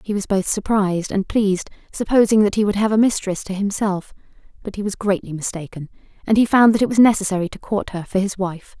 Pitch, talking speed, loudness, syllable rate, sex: 200 Hz, 225 wpm, -19 LUFS, 6.1 syllables/s, female